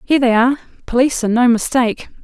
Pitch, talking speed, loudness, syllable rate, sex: 245 Hz, 160 wpm, -15 LUFS, 7.0 syllables/s, female